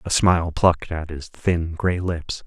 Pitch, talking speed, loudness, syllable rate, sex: 85 Hz, 195 wpm, -22 LUFS, 4.2 syllables/s, male